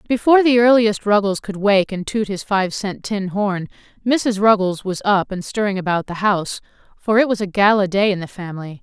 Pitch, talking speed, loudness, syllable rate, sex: 200 Hz, 210 wpm, -18 LUFS, 5.3 syllables/s, female